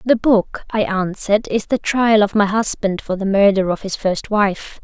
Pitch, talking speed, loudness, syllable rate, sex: 205 Hz, 210 wpm, -17 LUFS, 4.6 syllables/s, female